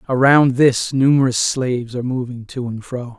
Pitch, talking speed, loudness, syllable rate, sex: 125 Hz, 170 wpm, -17 LUFS, 5.0 syllables/s, male